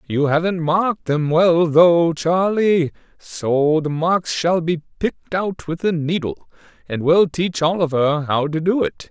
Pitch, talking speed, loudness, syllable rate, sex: 165 Hz, 165 wpm, -18 LUFS, 4.0 syllables/s, male